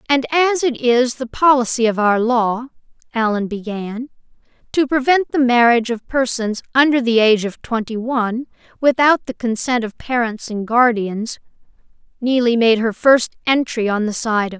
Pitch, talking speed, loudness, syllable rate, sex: 240 Hz, 160 wpm, -17 LUFS, 4.8 syllables/s, female